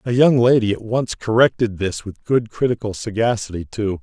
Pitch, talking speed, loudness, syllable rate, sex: 115 Hz, 180 wpm, -19 LUFS, 5.1 syllables/s, male